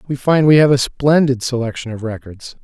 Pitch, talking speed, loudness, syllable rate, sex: 130 Hz, 205 wpm, -15 LUFS, 5.4 syllables/s, male